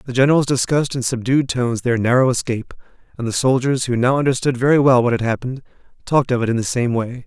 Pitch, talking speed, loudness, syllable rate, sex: 125 Hz, 225 wpm, -18 LUFS, 6.9 syllables/s, male